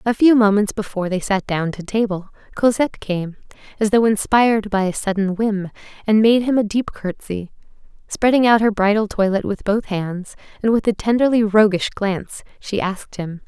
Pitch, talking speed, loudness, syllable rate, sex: 210 Hz, 185 wpm, -18 LUFS, 5.3 syllables/s, female